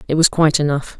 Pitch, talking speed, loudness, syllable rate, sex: 150 Hz, 240 wpm, -16 LUFS, 7.4 syllables/s, female